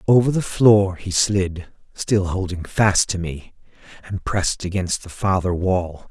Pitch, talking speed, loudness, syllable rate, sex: 95 Hz, 155 wpm, -20 LUFS, 4.0 syllables/s, male